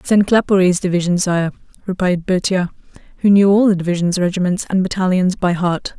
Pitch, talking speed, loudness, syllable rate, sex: 185 Hz, 160 wpm, -16 LUFS, 5.9 syllables/s, female